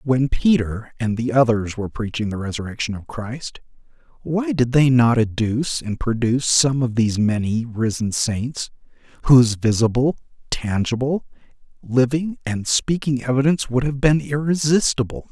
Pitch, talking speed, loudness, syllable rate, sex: 125 Hz, 135 wpm, -20 LUFS, 4.8 syllables/s, male